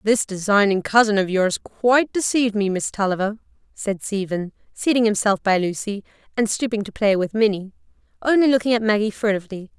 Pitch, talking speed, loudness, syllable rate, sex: 210 Hz, 165 wpm, -20 LUFS, 5.7 syllables/s, female